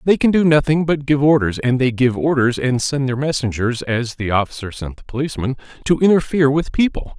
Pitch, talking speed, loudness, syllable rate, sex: 135 Hz, 210 wpm, -18 LUFS, 5.8 syllables/s, male